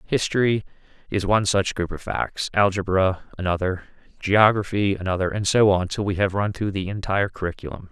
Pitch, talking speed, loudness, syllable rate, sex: 100 Hz, 165 wpm, -22 LUFS, 5.6 syllables/s, male